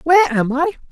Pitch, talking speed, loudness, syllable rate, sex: 235 Hz, 195 wpm, -16 LUFS, 5.7 syllables/s, male